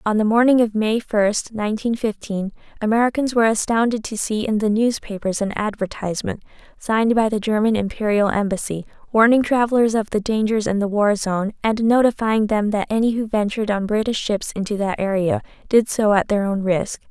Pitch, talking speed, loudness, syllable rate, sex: 215 Hz, 180 wpm, -20 LUFS, 5.5 syllables/s, female